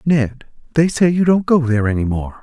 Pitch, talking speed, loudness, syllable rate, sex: 140 Hz, 225 wpm, -16 LUFS, 5.5 syllables/s, male